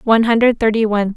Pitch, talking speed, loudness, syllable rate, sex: 220 Hz, 205 wpm, -15 LUFS, 7.6 syllables/s, female